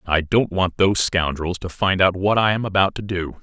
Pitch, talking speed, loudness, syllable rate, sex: 95 Hz, 245 wpm, -20 LUFS, 5.2 syllables/s, male